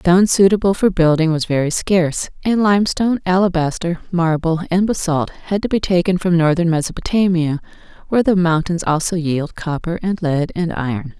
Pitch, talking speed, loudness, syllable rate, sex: 175 Hz, 160 wpm, -17 LUFS, 5.4 syllables/s, female